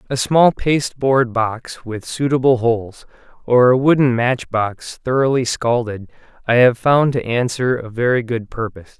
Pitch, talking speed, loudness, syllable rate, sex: 125 Hz, 160 wpm, -17 LUFS, 4.5 syllables/s, male